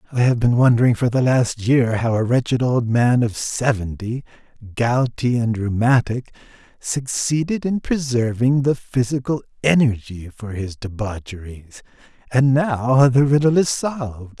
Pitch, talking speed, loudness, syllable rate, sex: 120 Hz, 135 wpm, -19 LUFS, 4.4 syllables/s, male